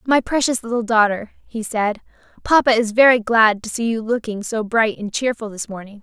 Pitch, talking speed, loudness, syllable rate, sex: 225 Hz, 200 wpm, -18 LUFS, 5.3 syllables/s, female